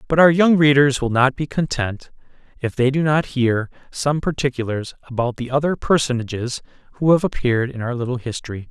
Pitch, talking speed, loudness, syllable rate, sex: 135 Hz, 180 wpm, -19 LUFS, 5.5 syllables/s, male